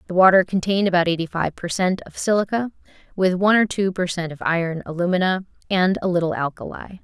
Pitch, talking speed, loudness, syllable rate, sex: 185 Hz, 195 wpm, -20 LUFS, 6.3 syllables/s, female